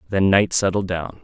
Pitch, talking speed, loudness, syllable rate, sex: 95 Hz, 195 wpm, -19 LUFS, 4.7 syllables/s, male